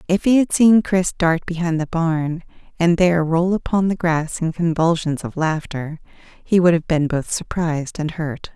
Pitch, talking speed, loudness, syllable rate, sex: 165 Hz, 190 wpm, -19 LUFS, 4.6 syllables/s, female